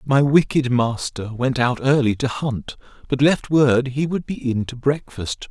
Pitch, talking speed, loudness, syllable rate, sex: 130 Hz, 185 wpm, -20 LUFS, 4.1 syllables/s, male